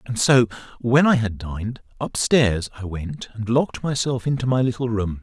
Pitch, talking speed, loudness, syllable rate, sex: 120 Hz, 195 wpm, -21 LUFS, 4.9 syllables/s, male